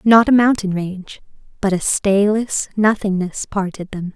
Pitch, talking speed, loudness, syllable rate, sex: 200 Hz, 145 wpm, -17 LUFS, 4.5 syllables/s, female